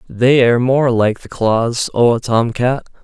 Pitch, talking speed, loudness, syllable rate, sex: 120 Hz, 200 wpm, -15 LUFS, 3.7 syllables/s, male